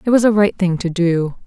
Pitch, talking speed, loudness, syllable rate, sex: 185 Hz, 285 wpm, -16 LUFS, 5.5 syllables/s, female